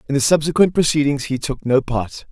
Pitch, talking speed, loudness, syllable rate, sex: 140 Hz, 210 wpm, -18 LUFS, 5.7 syllables/s, male